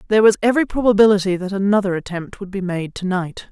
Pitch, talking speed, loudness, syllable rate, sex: 195 Hz, 205 wpm, -18 LUFS, 6.7 syllables/s, female